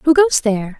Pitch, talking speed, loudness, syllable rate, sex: 265 Hz, 225 wpm, -15 LUFS, 5.3 syllables/s, female